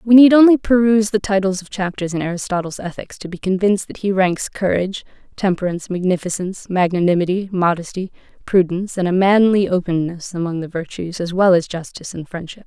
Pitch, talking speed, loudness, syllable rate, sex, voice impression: 190 Hz, 170 wpm, -18 LUFS, 6.1 syllables/s, female, feminine, adult-like, slightly calm, slightly elegant, slightly strict